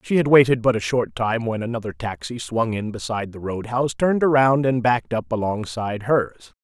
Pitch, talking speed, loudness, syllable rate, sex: 115 Hz, 210 wpm, -21 LUFS, 5.6 syllables/s, male